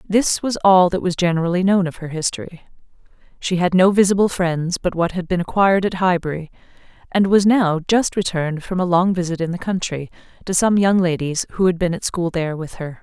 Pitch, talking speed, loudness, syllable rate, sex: 180 Hz, 210 wpm, -18 LUFS, 5.7 syllables/s, female